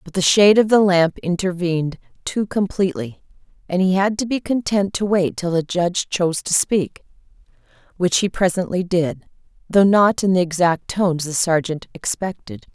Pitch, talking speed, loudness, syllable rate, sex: 180 Hz, 170 wpm, -19 LUFS, 5.1 syllables/s, female